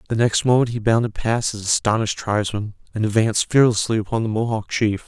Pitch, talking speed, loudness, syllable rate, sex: 110 Hz, 190 wpm, -20 LUFS, 6.2 syllables/s, male